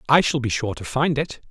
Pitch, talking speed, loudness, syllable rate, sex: 135 Hz, 280 wpm, -22 LUFS, 5.4 syllables/s, male